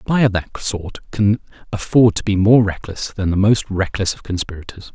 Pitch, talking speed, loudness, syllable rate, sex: 100 Hz, 205 wpm, -18 LUFS, 5.0 syllables/s, male